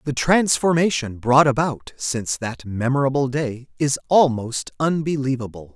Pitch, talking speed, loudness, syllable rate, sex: 135 Hz, 115 wpm, -20 LUFS, 4.5 syllables/s, male